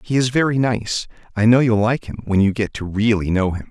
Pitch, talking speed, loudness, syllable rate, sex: 110 Hz, 245 wpm, -18 LUFS, 5.6 syllables/s, male